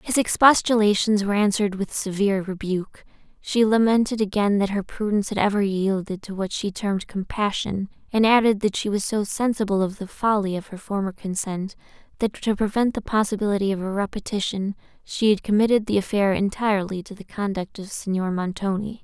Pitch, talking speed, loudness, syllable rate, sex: 205 Hz, 175 wpm, -23 LUFS, 5.7 syllables/s, female